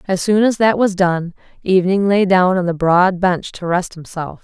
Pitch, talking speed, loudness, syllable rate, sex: 185 Hz, 215 wpm, -16 LUFS, 4.8 syllables/s, female